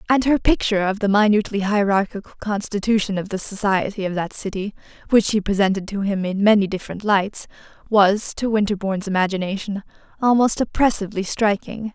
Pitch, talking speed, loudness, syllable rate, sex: 205 Hz, 150 wpm, -20 LUFS, 5.9 syllables/s, female